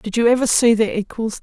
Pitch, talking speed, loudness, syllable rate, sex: 225 Hz, 250 wpm, -17 LUFS, 5.8 syllables/s, female